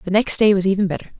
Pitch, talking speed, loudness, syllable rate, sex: 195 Hz, 300 wpm, -17 LUFS, 7.7 syllables/s, female